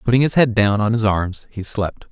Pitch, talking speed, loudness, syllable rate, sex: 110 Hz, 255 wpm, -18 LUFS, 5.2 syllables/s, male